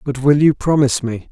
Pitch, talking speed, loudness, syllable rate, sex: 135 Hz, 225 wpm, -15 LUFS, 5.8 syllables/s, male